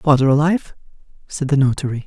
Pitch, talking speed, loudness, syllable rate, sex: 140 Hz, 145 wpm, -17 LUFS, 6.6 syllables/s, male